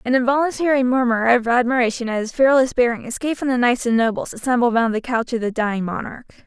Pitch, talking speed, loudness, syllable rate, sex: 245 Hz, 215 wpm, -19 LUFS, 6.5 syllables/s, female